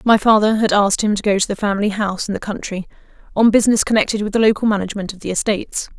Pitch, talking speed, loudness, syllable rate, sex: 205 Hz, 240 wpm, -17 LUFS, 7.5 syllables/s, female